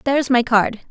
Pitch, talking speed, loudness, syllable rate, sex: 245 Hz, 200 wpm, -17 LUFS, 5.5 syllables/s, female